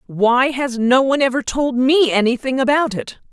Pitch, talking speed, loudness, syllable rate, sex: 255 Hz, 180 wpm, -16 LUFS, 4.9 syllables/s, female